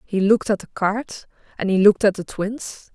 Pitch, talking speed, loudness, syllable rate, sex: 205 Hz, 225 wpm, -20 LUFS, 5.2 syllables/s, female